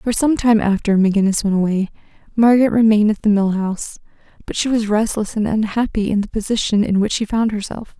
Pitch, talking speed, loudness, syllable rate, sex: 215 Hz, 205 wpm, -17 LUFS, 6.1 syllables/s, female